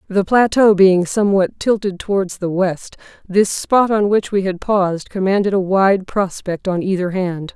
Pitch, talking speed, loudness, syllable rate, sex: 190 Hz, 175 wpm, -16 LUFS, 4.5 syllables/s, female